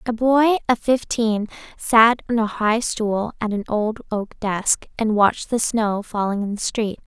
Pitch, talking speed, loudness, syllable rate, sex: 220 Hz, 185 wpm, -20 LUFS, 4.1 syllables/s, female